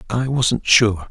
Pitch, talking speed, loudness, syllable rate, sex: 115 Hz, 165 wpm, -16 LUFS, 3.3 syllables/s, male